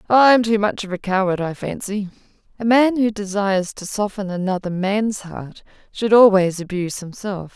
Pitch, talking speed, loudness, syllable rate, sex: 200 Hz, 165 wpm, -19 LUFS, 4.8 syllables/s, female